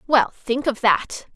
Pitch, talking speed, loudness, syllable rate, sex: 245 Hz, 180 wpm, -20 LUFS, 3.7 syllables/s, female